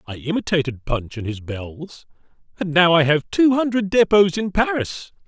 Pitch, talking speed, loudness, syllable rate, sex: 160 Hz, 170 wpm, -19 LUFS, 4.7 syllables/s, male